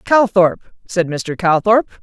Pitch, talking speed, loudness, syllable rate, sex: 190 Hz, 120 wpm, -15 LUFS, 3.4 syllables/s, female